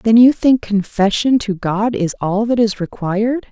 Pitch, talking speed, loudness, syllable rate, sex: 215 Hz, 190 wpm, -16 LUFS, 4.5 syllables/s, female